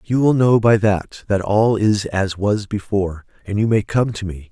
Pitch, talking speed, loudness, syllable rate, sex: 105 Hz, 225 wpm, -18 LUFS, 4.6 syllables/s, male